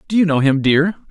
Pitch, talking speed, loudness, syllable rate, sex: 160 Hz, 270 wpm, -15 LUFS, 6.0 syllables/s, male